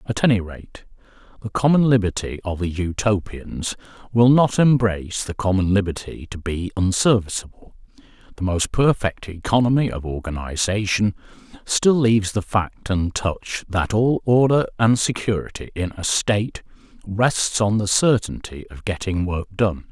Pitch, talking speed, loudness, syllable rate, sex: 100 Hz, 135 wpm, -20 LUFS, 4.7 syllables/s, male